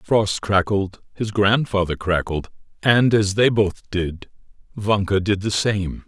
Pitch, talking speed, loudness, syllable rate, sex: 100 Hz, 150 wpm, -20 LUFS, 3.9 syllables/s, male